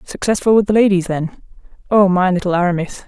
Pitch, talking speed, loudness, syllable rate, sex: 190 Hz, 155 wpm, -15 LUFS, 6.1 syllables/s, female